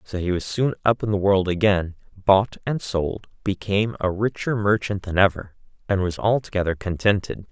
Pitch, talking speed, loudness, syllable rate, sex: 100 Hz, 175 wpm, -22 LUFS, 5.1 syllables/s, male